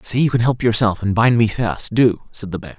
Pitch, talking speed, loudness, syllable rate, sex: 110 Hz, 280 wpm, -17 LUFS, 5.4 syllables/s, male